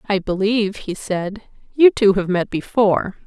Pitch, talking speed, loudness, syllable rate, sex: 205 Hz, 165 wpm, -18 LUFS, 4.5 syllables/s, female